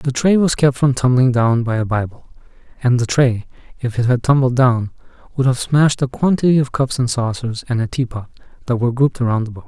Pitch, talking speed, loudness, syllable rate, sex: 125 Hz, 225 wpm, -17 LUFS, 5.9 syllables/s, male